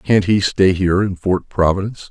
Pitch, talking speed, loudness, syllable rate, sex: 95 Hz, 200 wpm, -16 LUFS, 5.3 syllables/s, male